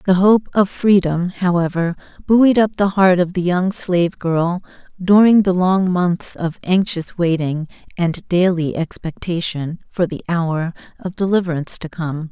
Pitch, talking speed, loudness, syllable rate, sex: 180 Hz, 150 wpm, -17 LUFS, 4.3 syllables/s, female